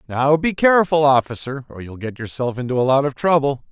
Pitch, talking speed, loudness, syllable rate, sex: 135 Hz, 210 wpm, -18 LUFS, 5.8 syllables/s, male